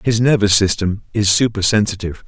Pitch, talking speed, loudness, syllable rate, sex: 105 Hz, 130 wpm, -15 LUFS, 5.8 syllables/s, male